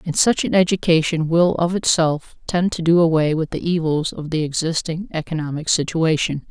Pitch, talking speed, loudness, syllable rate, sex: 165 Hz, 175 wpm, -19 LUFS, 5.1 syllables/s, female